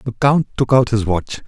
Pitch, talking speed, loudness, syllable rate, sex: 120 Hz, 245 wpm, -17 LUFS, 4.9 syllables/s, male